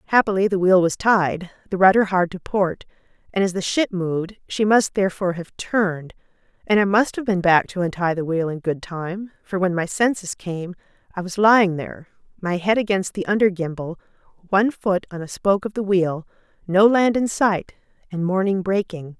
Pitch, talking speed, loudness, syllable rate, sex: 190 Hz, 195 wpm, -20 LUFS, 5.3 syllables/s, female